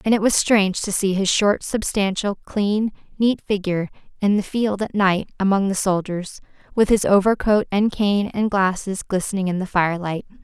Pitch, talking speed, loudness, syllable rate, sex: 200 Hz, 180 wpm, -20 LUFS, 5.0 syllables/s, female